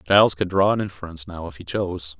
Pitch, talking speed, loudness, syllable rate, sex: 90 Hz, 245 wpm, -22 LUFS, 6.9 syllables/s, male